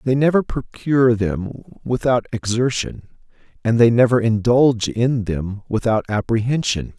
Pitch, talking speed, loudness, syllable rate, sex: 115 Hz, 120 wpm, -19 LUFS, 4.4 syllables/s, male